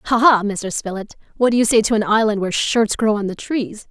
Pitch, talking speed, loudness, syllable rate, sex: 215 Hz, 260 wpm, -18 LUFS, 5.5 syllables/s, female